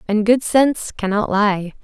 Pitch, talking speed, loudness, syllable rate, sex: 215 Hz, 165 wpm, -17 LUFS, 4.4 syllables/s, female